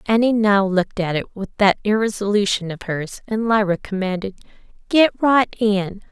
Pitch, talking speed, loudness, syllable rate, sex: 205 Hz, 155 wpm, -19 LUFS, 4.7 syllables/s, female